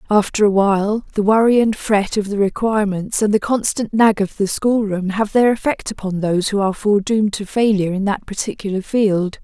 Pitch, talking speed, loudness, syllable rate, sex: 205 Hz, 195 wpm, -17 LUFS, 5.6 syllables/s, female